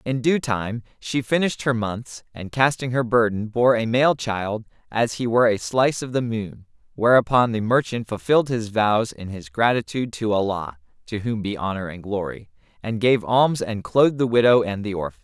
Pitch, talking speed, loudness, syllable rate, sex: 115 Hz, 195 wpm, -21 LUFS, 4.7 syllables/s, male